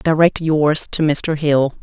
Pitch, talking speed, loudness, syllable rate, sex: 155 Hz, 165 wpm, -16 LUFS, 3.5 syllables/s, female